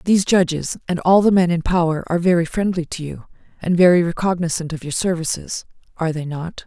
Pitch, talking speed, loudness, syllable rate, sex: 170 Hz, 200 wpm, -19 LUFS, 6.1 syllables/s, female